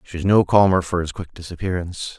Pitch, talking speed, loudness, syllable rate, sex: 90 Hz, 220 wpm, -19 LUFS, 6.2 syllables/s, male